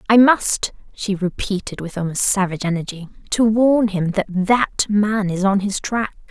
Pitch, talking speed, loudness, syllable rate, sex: 200 Hz, 170 wpm, -19 LUFS, 4.5 syllables/s, female